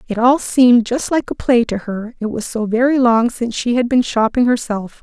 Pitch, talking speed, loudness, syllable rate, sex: 235 Hz, 240 wpm, -16 LUFS, 5.2 syllables/s, female